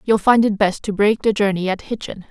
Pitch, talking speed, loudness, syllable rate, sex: 205 Hz, 260 wpm, -18 LUFS, 5.6 syllables/s, female